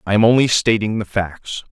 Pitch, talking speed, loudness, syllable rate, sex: 105 Hz, 205 wpm, -17 LUFS, 5.1 syllables/s, male